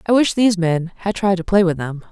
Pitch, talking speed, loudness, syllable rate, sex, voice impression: 190 Hz, 285 wpm, -18 LUFS, 5.6 syllables/s, female, feminine, adult-like, slightly relaxed, soft, fluent, raspy, calm, reassuring, elegant, kind, modest